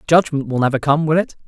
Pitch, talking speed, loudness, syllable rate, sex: 145 Hz, 245 wpm, -17 LUFS, 6.4 syllables/s, male